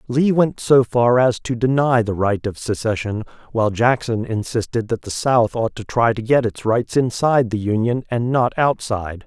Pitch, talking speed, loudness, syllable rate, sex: 120 Hz, 195 wpm, -19 LUFS, 4.8 syllables/s, male